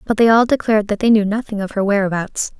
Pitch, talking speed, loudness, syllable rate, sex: 210 Hz, 255 wpm, -16 LUFS, 6.6 syllables/s, female